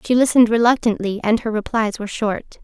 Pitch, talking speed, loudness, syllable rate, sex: 225 Hz, 185 wpm, -18 LUFS, 6.2 syllables/s, female